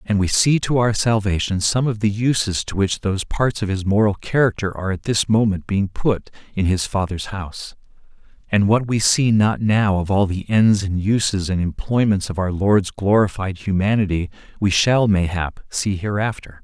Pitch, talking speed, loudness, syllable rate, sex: 100 Hz, 190 wpm, -19 LUFS, 4.9 syllables/s, male